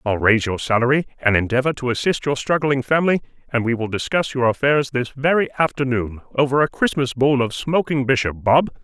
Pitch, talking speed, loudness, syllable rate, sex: 130 Hz, 190 wpm, -19 LUFS, 5.7 syllables/s, male